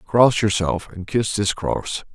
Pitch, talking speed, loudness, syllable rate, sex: 100 Hz, 170 wpm, -21 LUFS, 3.6 syllables/s, male